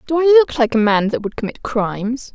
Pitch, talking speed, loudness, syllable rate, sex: 235 Hz, 255 wpm, -17 LUFS, 5.4 syllables/s, female